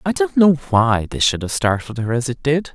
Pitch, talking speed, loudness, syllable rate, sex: 135 Hz, 260 wpm, -18 LUFS, 5.0 syllables/s, male